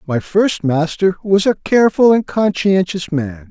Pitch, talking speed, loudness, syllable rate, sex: 180 Hz, 155 wpm, -15 LUFS, 4.2 syllables/s, male